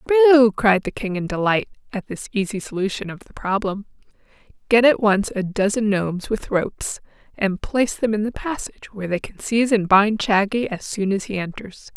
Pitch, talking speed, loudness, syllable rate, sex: 210 Hz, 195 wpm, -20 LUFS, 5.4 syllables/s, female